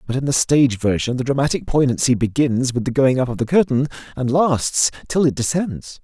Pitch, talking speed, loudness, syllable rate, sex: 130 Hz, 210 wpm, -18 LUFS, 5.5 syllables/s, male